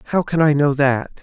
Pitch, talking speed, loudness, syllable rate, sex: 145 Hz, 245 wpm, -17 LUFS, 5.2 syllables/s, male